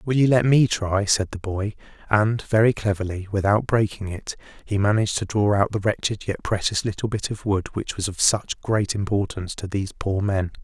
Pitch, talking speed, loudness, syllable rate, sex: 105 Hz, 210 wpm, -23 LUFS, 5.2 syllables/s, male